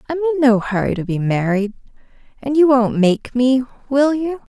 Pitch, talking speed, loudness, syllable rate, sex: 240 Hz, 185 wpm, -17 LUFS, 5.0 syllables/s, female